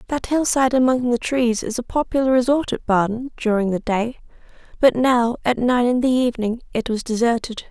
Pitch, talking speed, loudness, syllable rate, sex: 240 Hz, 185 wpm, -20 LUFS, 5.4 syllables/s, female